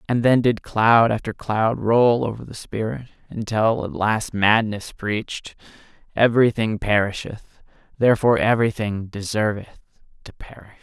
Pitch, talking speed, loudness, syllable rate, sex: 110 Hz, 120 wpm, -20 LUFS, 4.7 syllables/s, male